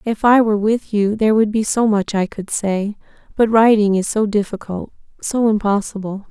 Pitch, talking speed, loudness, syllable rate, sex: 210 Hz, 190 wpm, -17 LUFS, 5.1 syllables/s, female